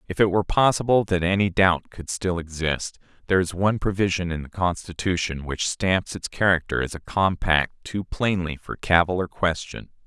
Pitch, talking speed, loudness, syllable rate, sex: 90 Hz, 180 wpm, -23 LUFS, 5.1 syllables/s, male